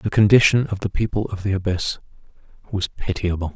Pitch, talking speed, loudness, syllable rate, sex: 100 Hz, 170 wpm, -21 LUFS, 5.7 syllables/s, male